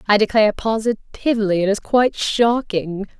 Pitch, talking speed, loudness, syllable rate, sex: 215 Hz, 130 wpm, -18 LUFS, 5.1 syllables/s, female